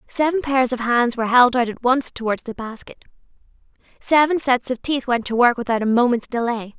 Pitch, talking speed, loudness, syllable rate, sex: 245 Hz, 205 wpm, -19 LUFS, 5.5 syllables/s, female